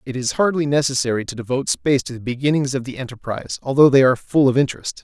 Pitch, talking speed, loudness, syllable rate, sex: 135 Hz, 225 wpm, -19 LUFS, 7.2 syllables/s, male